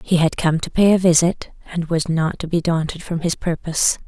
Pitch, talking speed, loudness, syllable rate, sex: 170 Hz, 235 wpm, -19 LUFS, 5.4 syllables/s, female